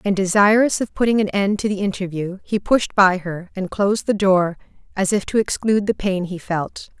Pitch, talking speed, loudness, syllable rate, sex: 195 Hz, 215 wpm, -19 LUFS, 5.2 syllables/s, female